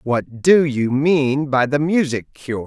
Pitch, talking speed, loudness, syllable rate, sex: 140 Hz, 180 wpm, -18 LUFS, 3.5 syllables/s, male